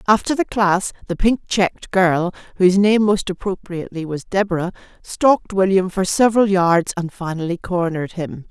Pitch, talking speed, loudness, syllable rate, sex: 185 Hz, 155 wpm, -18 LUFS, 6.2 syllables/s, female